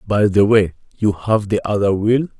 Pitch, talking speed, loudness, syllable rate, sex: 105 Hz, 200 wpm, -17 LUFS, 4.7 syllables/s, male